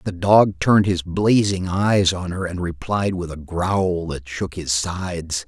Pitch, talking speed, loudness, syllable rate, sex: 90 Hz, 185 wpm, -20 LUFS, 4.0 syllables/s, male